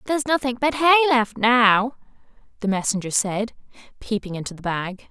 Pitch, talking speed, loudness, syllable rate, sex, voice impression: 230 Hz, 155 wpm, -21 LUFS, 5.3 syllables/s, female, feminine, slightly young, slightly tensed, powerful, slightly bright, clear, slightly raspy, refreshing, friendly, lively, slightly kind